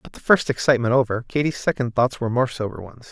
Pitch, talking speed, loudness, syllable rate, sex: 125 Hz, 230 wpm, -21 LUFS, 6.6 syllables/s, male